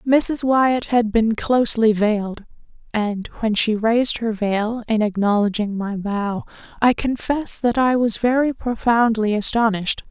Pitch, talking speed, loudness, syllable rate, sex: 225 Hz, 145 wpm, -19 LUFS, 4.3 syllables/s, female